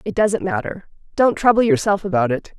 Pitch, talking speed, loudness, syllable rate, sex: 210 Hz, 185 wpm, -18 LUFS, 5.5 syllables/s, female